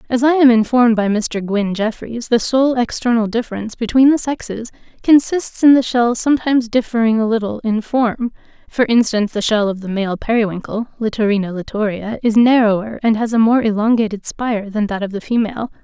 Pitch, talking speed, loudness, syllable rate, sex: 225 Hz, 180 wpm, -16 LUFS, 5.4 syllables/s, female